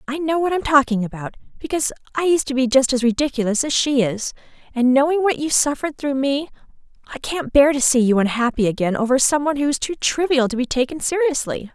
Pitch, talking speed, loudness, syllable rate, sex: 270 Hz, 225 wpm, -19 LUFS, 6.3 syllables/s, female